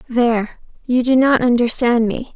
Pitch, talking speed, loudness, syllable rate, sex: 240 Hz, 125 wpm, -16 LUFS, 4.9 syllables/s, female